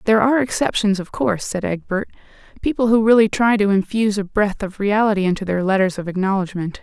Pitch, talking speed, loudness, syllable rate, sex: 200 Hz, 195 wpm, -18 LUFS, 6.3 syllables/s, female